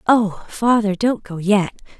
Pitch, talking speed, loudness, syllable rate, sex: 210 Hz, 150 wpm, -19 LUFS, 3.6 syllables/s, female